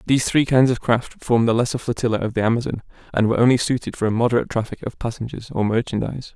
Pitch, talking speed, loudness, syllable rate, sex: 120 Hz, 225 wpm, -21 LUFS, 7.4 syllables/s, male